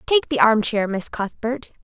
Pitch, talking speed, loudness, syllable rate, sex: 240 Hz, 165 wpm, -20 LUFS, 4.3 syllables/s, female